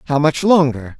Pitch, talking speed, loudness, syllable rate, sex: 145 Hz, 180 wpm, -15 LUFS, 4.9 syllables/s, male